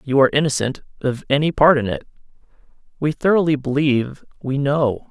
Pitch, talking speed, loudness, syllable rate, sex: 140 Hz, 140 wpm, -19 LUFS, 5.8 syllables/s, male